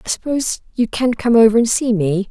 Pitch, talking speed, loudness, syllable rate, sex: 225 Hz, 235 wpm, -16 LUFS, 5.8 syllables/s, female